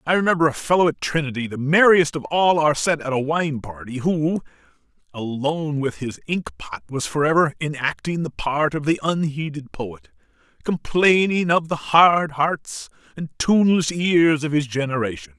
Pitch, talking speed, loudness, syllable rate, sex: 150 Hz, 170 wpm, -20 LUFS, 4.8 syllables/s, male